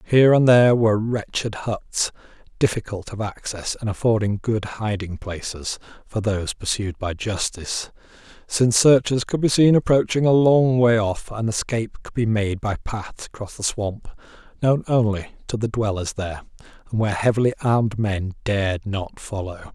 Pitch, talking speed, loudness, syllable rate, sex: 110 Hz, 160 wpm, -21 LUFS, 5.0 syllables/s, male